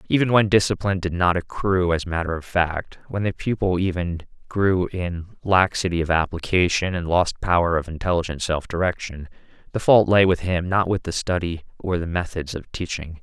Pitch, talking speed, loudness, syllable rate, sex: 90 Hz, 180 wpm, -22 LUFS, 5.1 syllables/s, male